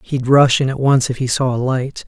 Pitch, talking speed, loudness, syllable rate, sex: 130 Hz, 290 wpm, -16 LUFS, 5.1 syllables/s, male